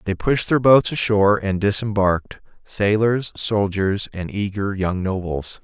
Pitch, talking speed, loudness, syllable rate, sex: 100 Hz, 130 wpm, -20 LUFS, 4.2 syllables/s, male